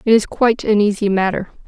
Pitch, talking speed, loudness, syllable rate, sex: 210 Hz, 215 wpm, -16 LUFS, 6.3 syllables/s, female